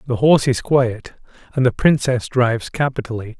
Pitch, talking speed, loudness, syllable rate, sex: 125 Hz, 160 wpm, -18 LUFS, 5.3 syllables/s, male